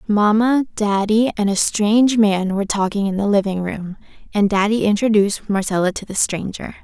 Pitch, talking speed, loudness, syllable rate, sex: 205 Hz, 165 wpm, -18 LUFS, 5.3 syllables/s, female